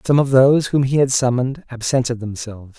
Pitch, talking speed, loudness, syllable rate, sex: 125 Hz, 195 wpm, -17 LUFS, 6.2 syllables/s, male